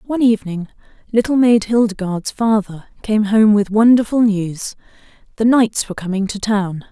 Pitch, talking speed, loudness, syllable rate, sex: 210 Hz, 145 wpm, -16 LUFS, 5.1 syllables/s, female